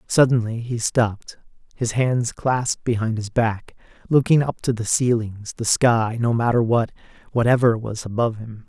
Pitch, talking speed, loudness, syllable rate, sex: 115 Hz, 140 wpm, -21 LUFS, 4.8 syllables/s, male